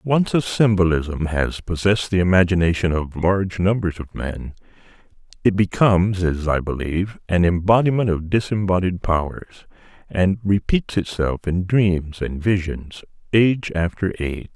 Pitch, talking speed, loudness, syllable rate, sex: 90 Hz, 130 wpm, -20 LUFS, 4.6 syllables/s, male